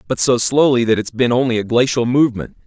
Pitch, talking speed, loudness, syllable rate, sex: 120 Hz, 225 wpm, -16 LUFS, 6.2 syllables/s, male